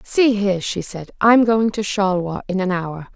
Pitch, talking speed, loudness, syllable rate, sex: 195 Hz, 210 wpm, -18 LUFS, 4.9 syllables/s, female